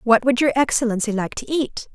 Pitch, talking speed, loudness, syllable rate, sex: 245 Hz, 215 wpm, -20 LUFS, 5.7 syllables/s, female